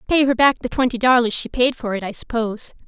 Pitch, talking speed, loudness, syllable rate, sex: 240 Hz, 250 wpm, -19 LUFS, 6.5 syllables/s, female